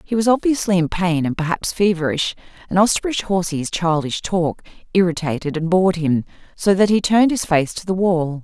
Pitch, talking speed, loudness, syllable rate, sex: 180 Hz, 185 wpm, -19 LUFS, 5.6 syllables/s, female